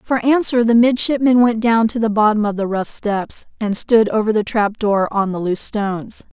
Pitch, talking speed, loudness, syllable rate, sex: 220 Hz, 215 wpm, -17 LUFS, 5.0 syllables/s, female